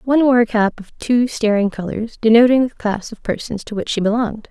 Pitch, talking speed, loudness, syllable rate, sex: 225 Hz, 225 wpm, -17 LUFS, 5.8 syllables/s, female